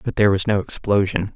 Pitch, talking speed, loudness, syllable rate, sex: 100 Hz, 220 wpm, -20 LUFS, 6.4 syllables/s, male